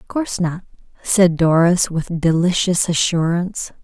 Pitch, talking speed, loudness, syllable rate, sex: 175 Hz, 125 wpm, -17 LUFS, 4.5 syllables/s, female